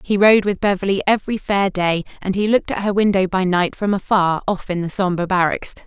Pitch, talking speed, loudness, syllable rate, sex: 190 Hz, 225 wpm, -18 LUFS, 5.7 syllables/s, female